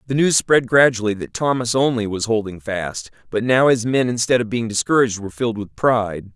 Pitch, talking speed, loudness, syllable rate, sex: 115 Hz, 210 wpm, -19 LUFS, 5.7 syllables/s, male